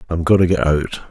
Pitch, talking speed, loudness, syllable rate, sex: 85 Hz, 325 wpm, -16 LUFS, 7.2 syllables/s, male